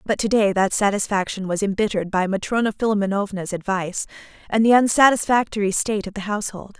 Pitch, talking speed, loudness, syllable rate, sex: 205 Hz, 150 wpm, -20 LUFS, 6.4 syllables/s, female